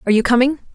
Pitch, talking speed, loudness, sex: 250 Hz, 240 wpm, -16 LUFS, female